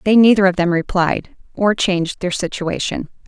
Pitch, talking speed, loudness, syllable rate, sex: 190 Hz, 165 wpm, -17 LUFS, 5.0 syllables/s, female